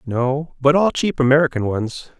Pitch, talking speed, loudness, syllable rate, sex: 140 Hz, 165 wpm, -18 LUFS, 4.5 syllables/s, male